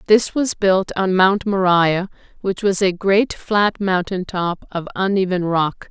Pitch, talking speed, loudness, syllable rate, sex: 190 Hz, 160 wpm, -18 LUFS, 3.8 syllables/s, female